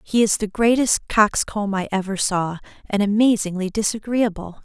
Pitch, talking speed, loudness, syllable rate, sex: 205 Hz, 140 wpm, -20 LUFS, 4.8 syllables/s, female